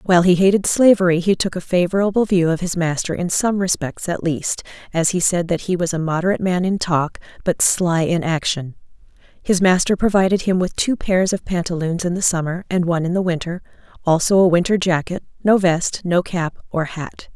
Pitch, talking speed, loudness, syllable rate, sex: 175 Hz, 205 wpm, -18 LUFS, 5.5 syllables/s, female